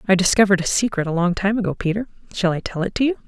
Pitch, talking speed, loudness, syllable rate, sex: 190 Hz, 275 wpm, -20 LUFS, 7.6 syllables/s, female